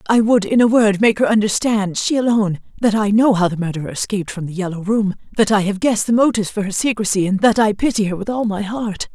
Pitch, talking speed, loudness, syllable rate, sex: 210 Hz, 230 wpm, -17 LUFS, 6.4 syllables/s, female